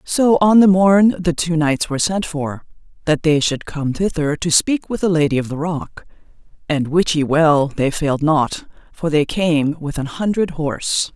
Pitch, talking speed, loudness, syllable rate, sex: 160 Hz, 200 wpm, -17 LUFS, 4.4 syllables/s, female